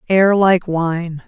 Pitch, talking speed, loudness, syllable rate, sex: 175 Hz, 140 wpm, -15 LUFS, 2.8 syllables/s, female